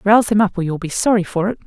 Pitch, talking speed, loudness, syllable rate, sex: 200 Hz, 325 wpm, -17 LUFS, 7.3 syllables/s, female